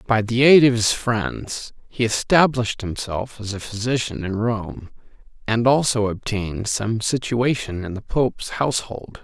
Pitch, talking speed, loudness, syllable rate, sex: 115 Hz, 150 wpm, -21 LUFS, 4.4 syllables/s, male